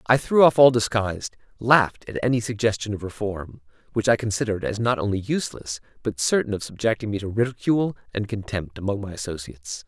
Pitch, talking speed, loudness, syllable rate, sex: 105 Hz, 180 wpm, -23 LUFS, 6.2 syllables/s, male